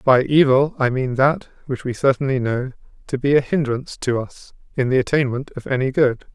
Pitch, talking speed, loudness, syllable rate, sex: 130 Hz, 200 wpm, -19 LUFS, 5.3 syllables/s, male